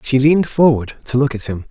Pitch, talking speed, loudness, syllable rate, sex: 130 Hz, 245 wpm, -16 LUFS, 5.9 syllables/s, male